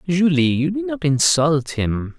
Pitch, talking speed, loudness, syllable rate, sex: 140 Hz, 135 wpm, -18 LUFS, 3.9 syllables/s, male